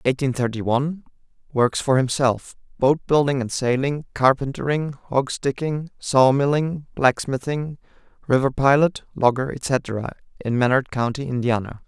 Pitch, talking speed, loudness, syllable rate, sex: 135 Hz, 105 wpm, -21 LUFS, 4.6 syllables/s, male